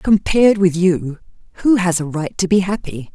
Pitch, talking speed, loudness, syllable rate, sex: 180 Hz, 190 wpm, -16 LUFS, 4.9 syllables/s, female